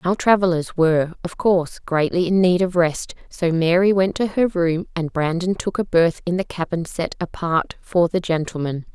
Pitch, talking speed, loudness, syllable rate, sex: 175 Hz, 195 wpm, -20 LUFS, 4.7 syllables/s, female